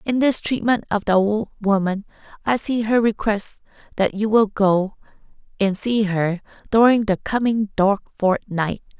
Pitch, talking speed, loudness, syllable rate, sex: 210 Hz, 155 wpm, -20 LUFS, 4.3 syllables/s, female